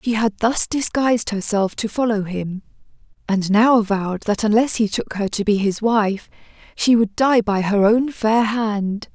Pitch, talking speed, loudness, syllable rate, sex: 215 Hz, 185 wpm, -19 LUFS, 4.3 syllables/s, female